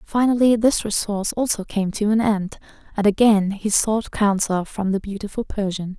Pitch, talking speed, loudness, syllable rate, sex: 210 Hz, 170 wpm, -20 LUFS, 4.9 syllables/s, female